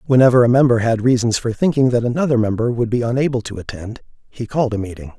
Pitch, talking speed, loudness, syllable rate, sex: 120 Hz, 220 wpm, -17 LUFS, 6.7 syllables/s, male